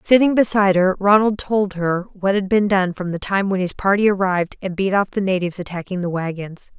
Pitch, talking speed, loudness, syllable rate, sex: 190 Hz, 220 wpm, -19 LUFS, 5.6 syllables/s, female